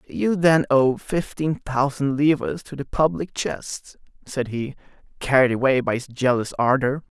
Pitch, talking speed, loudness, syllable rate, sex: 135 Hz, 150 wpm, -22 LUFS, 4.3 syllables/s, male